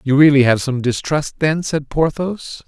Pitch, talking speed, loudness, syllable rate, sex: 145 Hz, 180 wpm, -17 LUFS, 4.3 syllables/s, male